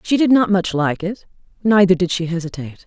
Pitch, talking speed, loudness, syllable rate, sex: 185 Hz, 210 wpm, -17 LUFS, 6.0 syllables/s, female